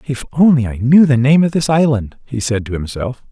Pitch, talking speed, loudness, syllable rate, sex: 130 Hz, 235 wpm, -14 LUFS, 5.3 syllables/s, male